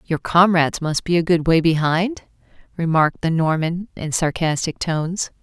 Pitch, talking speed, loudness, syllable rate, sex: 165 Hz, 155 wpm, -19 LUFS, 4.9 syllables/s, female